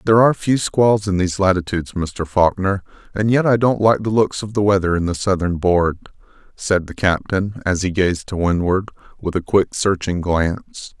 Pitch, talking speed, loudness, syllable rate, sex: 95 Hz, 195 wpm, -18 LUFS, 5.1 syllables/s, male